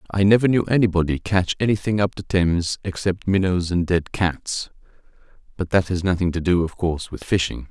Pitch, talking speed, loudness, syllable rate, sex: 90 Hz, 185 wpm, -21 LUFS, 5.5 syllables/s, male